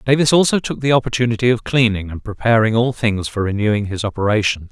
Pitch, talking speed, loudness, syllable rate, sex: 115 Hz, 190 wpm, -17 LUFS, 6.3 syllables/s, male